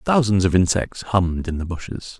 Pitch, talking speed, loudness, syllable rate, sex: 95 Hz, 190 wpm, -20 LUFS, 5.3 syllables/s, male